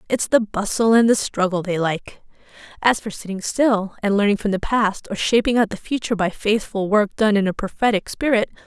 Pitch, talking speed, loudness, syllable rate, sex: 210 Hz, 210 wpm, -20 LUFS, 5.4 syllables/s, female